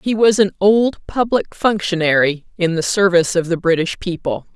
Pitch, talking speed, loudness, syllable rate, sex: 185 Hz, 170 wpm, -17 LUFS, 5.0 syllables/s, female